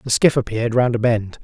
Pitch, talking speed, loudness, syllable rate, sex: 115 Hz, 250 wpm, -18 LUFS, 5.8 syllables/s, male